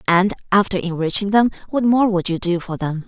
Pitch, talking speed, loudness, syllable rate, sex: 190 Hz, 215 wpm, -18 LUFS, 5.5 syllables/s, female